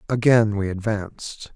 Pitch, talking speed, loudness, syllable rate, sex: 105 Hz, 115 wpm, -21 LUFS, 4.4 syllables/s, male